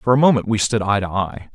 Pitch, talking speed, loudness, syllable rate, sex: 110 Hz, 310 wpm, -18 LUFS, 6.1 syllables/s, male